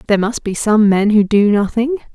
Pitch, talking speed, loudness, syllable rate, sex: 215 Hz, 225 wpm, -14 LUFS, 5.5 syllables/s, female